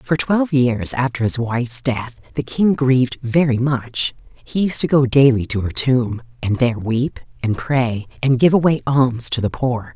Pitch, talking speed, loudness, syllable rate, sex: 130 Hz, 195 wpm, -18 LUFS, 4.4 syllables/s, female